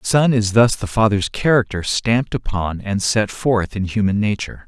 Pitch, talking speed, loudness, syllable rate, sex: 105 Hz, 195 wpm, -18 LUFS, 5.0 syllables/s, male